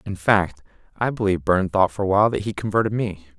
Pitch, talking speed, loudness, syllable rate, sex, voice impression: 100 Hz, 230 wpm, -21 LUFS, 6.7 syllables/s, male, masculine, adult-like, slightly relaxed, bright, clear, slightly raspy, cool, intellectual, calm, friendly, reassuring, wild, kind, modest